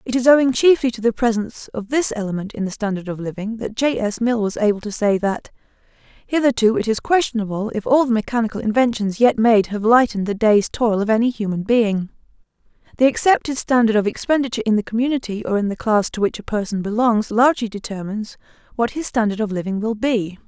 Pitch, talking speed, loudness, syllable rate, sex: 225 Hz, 205 wpm, -19 LUFS, 6.1 syllables/s, female